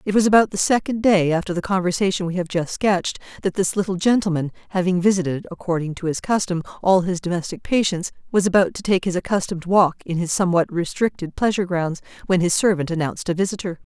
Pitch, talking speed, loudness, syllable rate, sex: 185 Hz, 200 wpm, -21 LUFS, 6.4 syllables/s, female